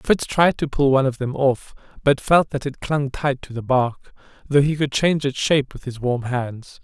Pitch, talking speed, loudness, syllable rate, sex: 135 Hz, 235 wpm, -20 LUFS, 4.9 syllables/s, male